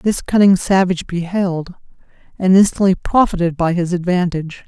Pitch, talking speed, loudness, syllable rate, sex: 180 Hz, 130 wpm, -16 LUFS, 5.2 syllables/s, female